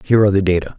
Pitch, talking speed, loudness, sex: 95 Hz, 305 wpm, -15 LUFS, male